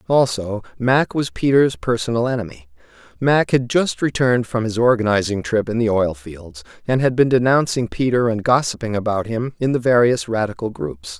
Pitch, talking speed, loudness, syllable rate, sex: 115 Hz, 170 wpm, -19 LUFS, 5.2 syllables/s, male